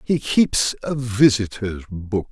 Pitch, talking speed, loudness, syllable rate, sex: 115 Hz, 130 wpm, -20 LUFS, 3.4 syllables/s, male